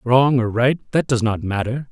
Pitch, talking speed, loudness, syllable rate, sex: 125 Hz, 220 wpm, -19 LUFS, 4.4 syllables/s, male